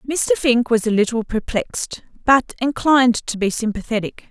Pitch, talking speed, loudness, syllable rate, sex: 240 Hz, 155 wpm, -19 LUFS, 5.1 syllables/s, female